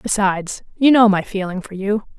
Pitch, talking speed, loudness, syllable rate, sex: 200 Hz, 195 wpm, -17 LUFS, 5.2 syllables/s, female